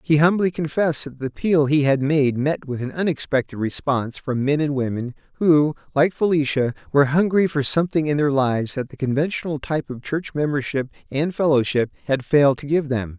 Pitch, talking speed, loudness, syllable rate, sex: 145 Hz, 190 wpm, -21 LUFS, 5.7 syllables/s, male